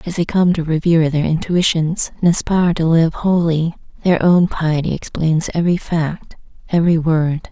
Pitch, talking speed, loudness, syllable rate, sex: 165 Hz, 160 wpm, -16 LUFS, 5.1 syllables/s, female